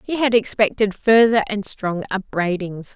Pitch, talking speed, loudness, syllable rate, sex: 205 Hz, 140 wpm, -19 LUFS, 4.5 syllables/s, female